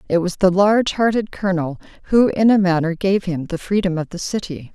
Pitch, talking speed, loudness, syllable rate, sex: 185 Hz, 215 wpm, -18 LUFS, 5.7 syllables/s, female